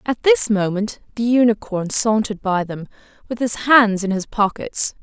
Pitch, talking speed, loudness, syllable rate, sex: 215 Hz, 165 wpm, -18 LUFS, 4.7 syllables/s, female